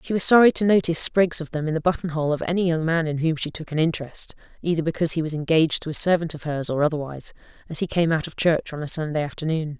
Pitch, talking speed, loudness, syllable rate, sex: 160 Hz, 270 wpm, -22 LUFS, 6.9 syllables/s, female